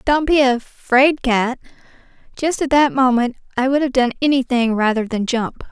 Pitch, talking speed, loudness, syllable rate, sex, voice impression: 255 Hz, 170 wpm, -17 LUFS, 4.7 syllables/s, female, very feminine, young, very thin, very tensed, powerful, very bright, hard, very clear, very fluent, slightly raspy, very cute, slightly intellectual, very refreshing, slightly sincere, slightly calm, very friendly, reassuring, very unique, elegant, slightly wild, sweet, very lively, slightly kind, intense, sharp, very light